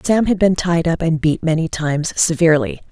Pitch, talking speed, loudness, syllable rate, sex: 165 Hz, 205 wpm, -17 LUFS, 5.5 syllables/s, female